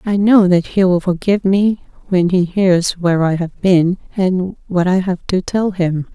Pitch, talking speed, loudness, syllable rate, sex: 185 Hz, 205 wpm, -15 LUFS, 4.3 syllables/s, female